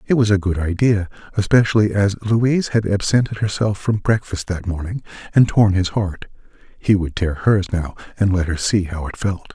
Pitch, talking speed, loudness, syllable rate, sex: 100 Hz, 195 wpm, -19 LUFS, 5.2 syllables/s, male